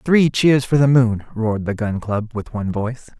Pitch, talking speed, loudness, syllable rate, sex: 120 Hz, 225 wpm, -18 LUFS, 5.0 syllables/s, male